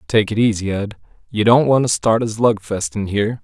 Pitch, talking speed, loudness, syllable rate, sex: 110 Hz, 225 wpm, -17 LUFS, 5.4 syllables/s, male